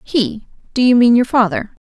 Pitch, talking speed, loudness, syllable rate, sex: 225 Hz, 160 wpm, -14 LUFS, 4.9 syllables/s, female